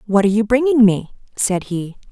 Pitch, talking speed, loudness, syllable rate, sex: 210 Hz, 200 wpm, -17 LUFS, 5.6 syllables/s, female